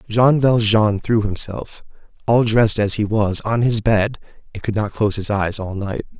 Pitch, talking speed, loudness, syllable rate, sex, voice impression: 110 Hz, 195 wpm, -18 LUFS, 4.7 syllables/s, male, masculine, adult-like, tensed, powerful, clear, fluent, raspy, cool, intellectual, calm, friendly, reassuring, wild, slightly lively, slightly kind